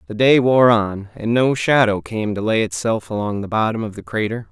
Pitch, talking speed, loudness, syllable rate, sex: 110 Hz, 225 wpm, -18 LUFS, 5.1 syllables/s, male